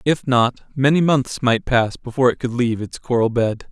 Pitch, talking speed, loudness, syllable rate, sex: 125 Hz, 210 wpm, -19 LUFS, 5.3 syllables/s, male